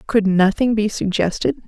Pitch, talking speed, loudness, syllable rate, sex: 205 Hz, 145 wpm, -18 LUFS, 4.6 syllables/s, female